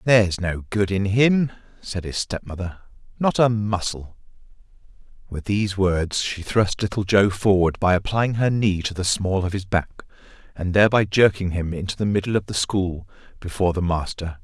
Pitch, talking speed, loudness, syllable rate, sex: 95 Hz, 175 wpm, -22 LUFS, 5.0 syllables/s, male